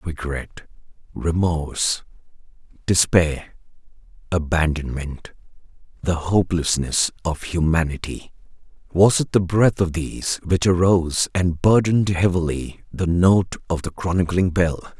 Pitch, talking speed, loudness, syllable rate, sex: 85 Hz, 95 wpm, -20 LUFS, 4.2 syllables/s, male